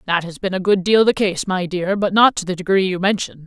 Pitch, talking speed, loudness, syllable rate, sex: 190 Hz, 295 wpm, -18 LUFS, 5.7 syllables/s, female